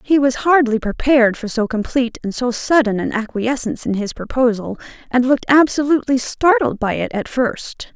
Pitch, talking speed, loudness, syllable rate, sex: 250 Hz, 175 wpm, -17 LUFS, 5.4 syllables/s, female